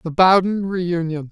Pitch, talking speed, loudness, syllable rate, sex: 175 Hz, 135 wpm, -18 LUFS, 4.1 syllables/s, male